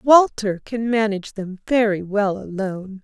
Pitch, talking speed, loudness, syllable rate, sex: 210 Hz, 140 wpm, -21 LUFS, 4.5 syllables/s, female